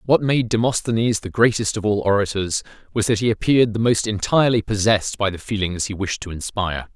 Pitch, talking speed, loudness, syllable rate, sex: 105 Hz, 200 wpm, -20 LUFS, 6.0 syllables/s, male